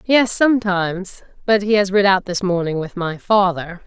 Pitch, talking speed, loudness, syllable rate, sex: 195 Hz, 185 wpm, -17 LUFS, 4.8 syllables/s, female